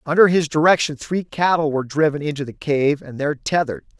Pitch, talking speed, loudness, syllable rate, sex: 150 Hz, 195 wpm, -19 LUFS, 6.1 syllables/s, male